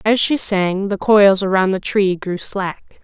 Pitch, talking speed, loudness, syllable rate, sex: 195 Hz, 200 wpm, -16 LUFS, 3.8 syllables/s, female